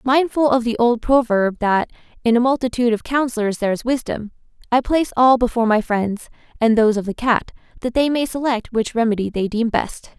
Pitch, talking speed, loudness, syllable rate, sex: 235 Hz, 200 wpm, -19 LUFS, 5.8 syllables/s, female